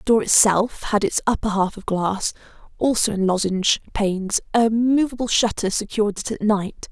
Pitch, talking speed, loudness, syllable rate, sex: 210 Hz, 165 wpm, -20 LUFS, 5.1 syllables/s, female